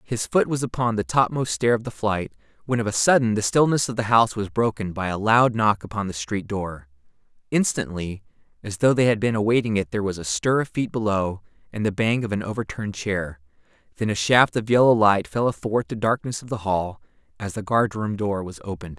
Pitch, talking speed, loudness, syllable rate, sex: 110 Hz, 220 wpm, -22 LUFS, 5.7 syllables/s, male